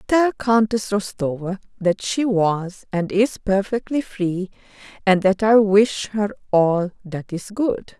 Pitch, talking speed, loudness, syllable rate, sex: 205 Hz, 145 wpm, -20 LUFS, 3.6 syllables/s, female